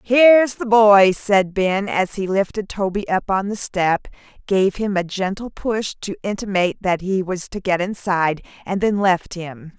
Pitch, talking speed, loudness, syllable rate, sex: 195 Hz, 185 wpm, -19 LUFS, 4.4 syllables/s, female